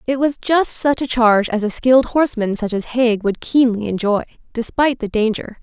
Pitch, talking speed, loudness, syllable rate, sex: 235 Hz, 205 wpm, -17 LUFS, 5.4 syllables/s, female